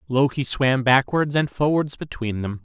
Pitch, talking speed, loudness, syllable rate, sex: 135 Hz, 160 wpm, -21 LUFS, 4.5 syllables/s, male